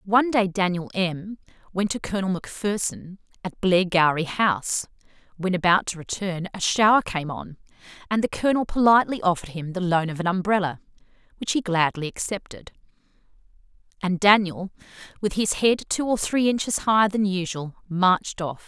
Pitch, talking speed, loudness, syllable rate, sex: 190 Hz, 155 wpm, -23 LUFS, 5.5 syllables/s, female